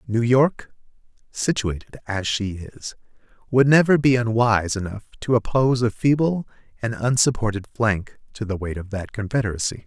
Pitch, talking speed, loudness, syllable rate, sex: 115 Hz, 145 wpm, -21 LUFS, 5.1 syllables/s, male